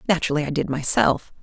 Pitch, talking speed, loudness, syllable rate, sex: 155 Hz, 170 wpm, -22 LUFS, 6.8 syllables/s, female